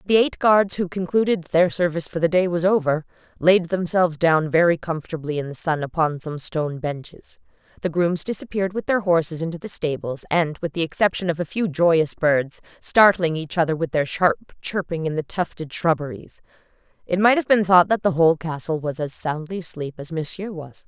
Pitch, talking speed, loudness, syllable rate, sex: 170 Hz, 200 wpm, -21 LUFS, 5.4 syllables/s, female